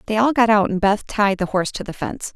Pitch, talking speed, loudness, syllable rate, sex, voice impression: 205 Hz, 305 wpm, -19 LUFS, 6.5 syllables/s, female, very feminine, very middle-aged, very thin, very tensed, powerful, bright, slightly soft, very clear, very fluent, raspy, slightly cool, intellectual, refreshing, slightly sincere, slightly calm, slightly friendly, slightly reassuring, unique, slightly elegant, wild, slightly sweet, lively, strict, intense, sharp, slightly light